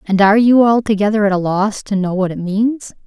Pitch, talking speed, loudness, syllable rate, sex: 205 Hz, 235 wpm, -14 LUFS, 5.6 syllables/s, female